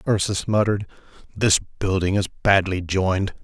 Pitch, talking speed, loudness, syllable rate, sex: 95 Hz, 120 wpm, -21 LUFS, 5.1 syllables/s, male